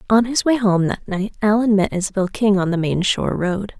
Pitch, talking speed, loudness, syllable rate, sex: 200 Hz, 235 wpm, -18 LUFS, 5.5 syllables/s, female